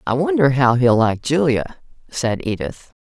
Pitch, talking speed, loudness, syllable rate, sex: 135 Hz, 160 wpm, -18 LUFS, 4.5 syllables/s, female